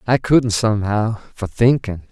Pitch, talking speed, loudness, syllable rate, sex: 110 Hz, 140 wpm, -18 LUFS, 4.4 syllables/s, male